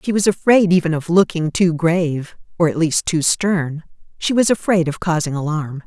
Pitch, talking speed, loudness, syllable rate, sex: 170 Hz, 195 wpm, -17 LUFS, 5.0 syllables/s, female